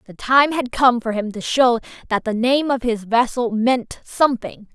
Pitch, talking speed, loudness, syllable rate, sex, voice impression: 240 Hz, 200 wpm, -19 LUFS, 4.5 syllables/s, female, very feminine, slightly young, slightly adult-like, very thin, very tensed, slightly powerful, very bright, slightly hard, very clear, slightly fluent, cute, slightly intellectual, refreshing, sincere, slightly friendly, slightly reassuring, very unique, wild, very lively, slightly kind, intense, slightly light